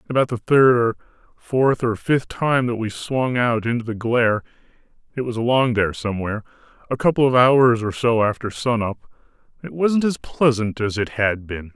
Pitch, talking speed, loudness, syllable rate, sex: 120 Hz, 180 wpm, -20 LUFS, 5.2 syllables/s, male